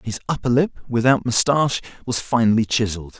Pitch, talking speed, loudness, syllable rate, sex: 120 Hz, 150 wpm, -20 LUFS, 5.9 syllables/s, male